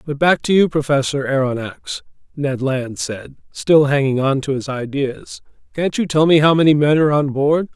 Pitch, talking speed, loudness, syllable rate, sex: 145 Hz, 195 wpm, -17 LUFS, 4.9 syllables/s, male